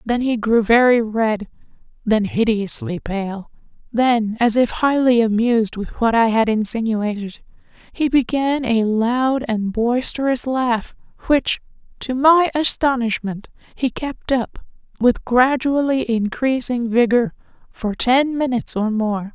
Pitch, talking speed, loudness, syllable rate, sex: 235 Hz, 120 wpm, -18 LUFS, 3.9 syllables/s, female